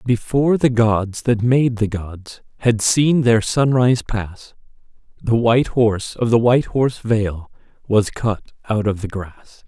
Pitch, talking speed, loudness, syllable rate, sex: 115 Hz, 160 wpm, -18 LUFS, 4.3 syllables/s, male